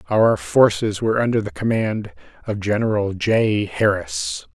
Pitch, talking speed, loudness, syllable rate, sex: 110 Hz, 130 wpm, -20 LUFS, 4.3 syllables/s, male